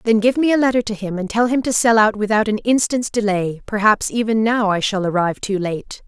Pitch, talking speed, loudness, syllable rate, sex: 215 Hz, 245 wpm, -18 LUFS, 5.6 syllables/s, female